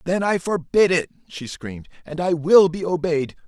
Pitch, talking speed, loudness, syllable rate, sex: 170 Hz, 190 wpm, -20 LUFS, 4.8 syllables/s, male